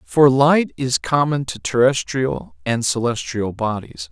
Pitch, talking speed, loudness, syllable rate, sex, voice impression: 120 Hz, 130 wpm, -19 LUFS, 3.9 syllables/s, male, masculine, adult-like, clear, slightly refreshing, sincere, friendly